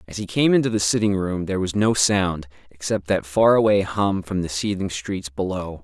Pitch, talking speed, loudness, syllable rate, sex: 95 Hz, 215 wpm, -21 LUFS, 5.1 syllables/s, male